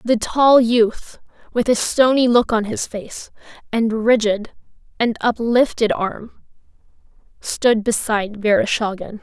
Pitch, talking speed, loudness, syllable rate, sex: 225 Hz, 115 wpm, -18 LUFS, 3.9 syllables/s, female